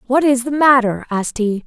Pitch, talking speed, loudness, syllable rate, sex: 250 Hz, 215 wpm, -16 LUFS, 5.5 syllables/s, female